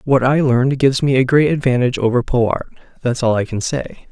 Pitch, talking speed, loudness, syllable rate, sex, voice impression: 130 Hz, 220 wpm, -16 LUFS, 5.9 syllables/s, male, masculine, adult-like, relaxed, weak, dark, soft, cool, calm, reassuring, slightly wild, kind, modest